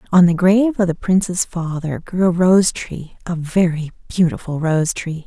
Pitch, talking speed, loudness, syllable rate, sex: 175 Hz, 180 wpm, -17 LUFS, 4.6 syllables/s, female